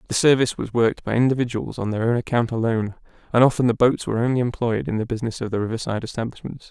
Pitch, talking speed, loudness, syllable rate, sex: 115 Hz, 225 wpm, -22 LUFS, 7.5 syllables/s, male